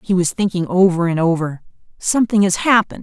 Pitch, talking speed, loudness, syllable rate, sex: 185 Hz, 180 wpm, -17 LUFS, 6.1 syllables/s, female